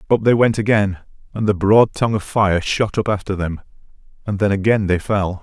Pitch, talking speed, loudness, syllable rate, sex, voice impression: 100 Hz, 210 wpm, -18 LUFS, 5.4 syllables/s, male, masculine, adult-like, slightly dark, clear, slightly fluent, cool, sincere, slightly mature, reassuring, wild, kind, slightly modest